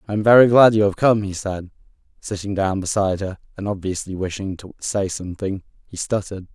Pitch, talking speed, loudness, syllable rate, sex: 100 Hz, 195 wpm, -20 LUFS, 5.9 syllables/s, male